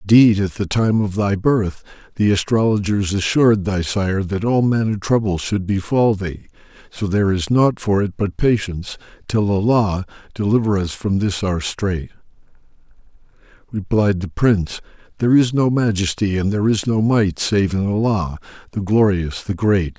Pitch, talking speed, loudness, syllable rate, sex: 100 Hz, 165 wpm, -18 LUFS, 4.9 syllables/s, male